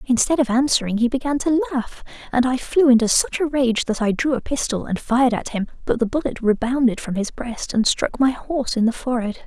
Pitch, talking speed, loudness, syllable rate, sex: 245 Hz, 235 wpm, -20 LUFS, 5.7 syllables/s, female